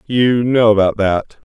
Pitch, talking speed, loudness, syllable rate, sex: 110 Hz, 160 wpm, -14 LUFS, 3.8 syllables/s, male